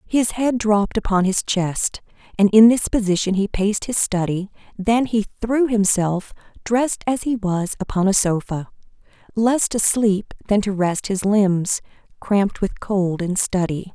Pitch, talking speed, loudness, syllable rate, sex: 205 Hz, 165 wpm, -19 LUFS, 4.4 syllables/s, female